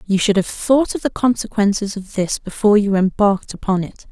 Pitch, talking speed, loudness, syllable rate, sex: 205 Hz, 205 wpm, -18 LUFS, 5.6 syllables/s, female